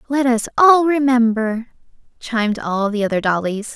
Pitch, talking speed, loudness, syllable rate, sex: 235 Hz, 145 wpm, -17 LUFS, 4.7 syllables/s, female